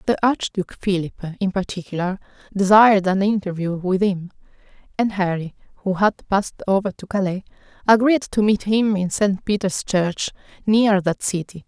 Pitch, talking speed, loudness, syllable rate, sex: 195 Hz, 150 wpm, -20 LUFS, 5.0 syllables/s, female